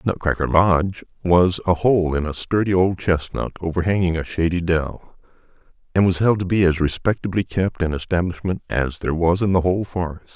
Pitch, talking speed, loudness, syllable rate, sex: 90 Hz, 180 wpm, -20 LUFS, 5.4 syllables/s, male